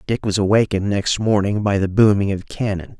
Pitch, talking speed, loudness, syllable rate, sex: 100 Hz, 200 wpm, -18 LUFS, 5.6 syllables/s, male